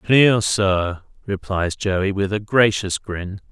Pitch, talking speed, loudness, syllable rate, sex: 100 Hz, 135 wpm, -20 LUFS, 3.1 syllables/s, male